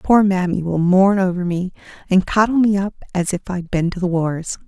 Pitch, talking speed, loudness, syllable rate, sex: 185 Hz, 220 wpm, -18 LUFS, 5.1 syllables/s, female